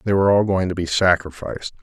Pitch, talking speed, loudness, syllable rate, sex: 90 Hz, 230 wpm, -19 LUFS, 6.7 syllables/s, male